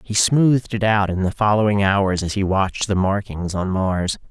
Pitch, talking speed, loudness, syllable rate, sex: 100 Hz, 210 wpm, -19 LUFS, 4.9 syllables/s, male